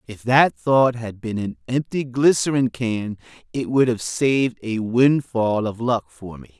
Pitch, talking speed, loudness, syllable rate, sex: 120 Hz, 175 wpm, -20 LUFS, 4.1 syllables/s, male